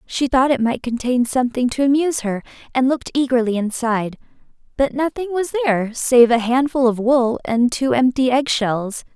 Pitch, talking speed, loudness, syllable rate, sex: 250 Hz, 170 wpm, -18 LUFS, 5.2 syllables/s, female